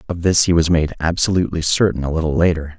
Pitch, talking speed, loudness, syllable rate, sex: 85 Hz, 215 wpm, -17 LUFS, 6.6 syllables/s, male